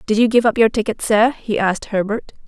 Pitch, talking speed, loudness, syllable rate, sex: 220 Hz, 240 wpm, -17 LUFS, 5.9 syllables/s, female